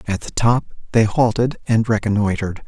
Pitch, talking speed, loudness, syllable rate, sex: 110 Hz, 155 wpm, -19 LUFS, 5.1 syllables/s, male